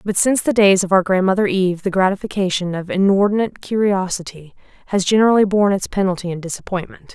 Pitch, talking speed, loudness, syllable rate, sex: 190 Hz, 170 wpm, -17 LUFS, 6.6 syllables/s, female